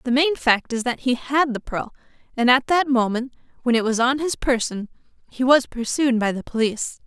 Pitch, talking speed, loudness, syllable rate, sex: 250 Hz, 210 wpm, -21 LUFS, 5.2 syllables/s, female